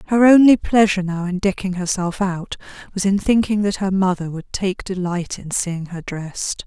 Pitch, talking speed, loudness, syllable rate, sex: 190 Hz, 190 wpm, -19 LUFS, 4.9 syllables/s, female